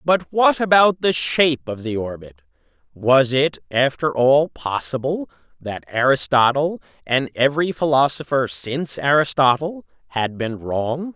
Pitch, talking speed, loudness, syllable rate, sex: 140 Hz, 120 wpm, -19 LUFS, 4.4 syllables/s, male